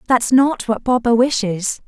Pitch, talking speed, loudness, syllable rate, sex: 235 Hz, 160 wpm, -16 LUFS, 4.2 syllables/s, female